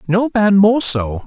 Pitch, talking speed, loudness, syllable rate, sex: 190 Hz, 190 wpm, -14 LUFS, 3.8 syllables/s, male